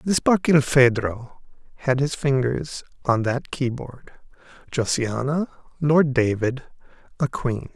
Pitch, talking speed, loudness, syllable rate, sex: 135 Hz, 95 wpm, -22 LUFS, 3.7 syllables/s, male